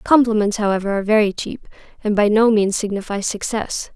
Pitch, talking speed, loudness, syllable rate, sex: 210 Hz, 165 wpm, -18 LUFS, 5.7 syllables/s, female